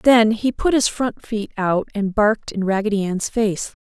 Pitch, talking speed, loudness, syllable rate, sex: 215 Hz, 205 wpm, -20 LUFS, 4.4 syllables/s, female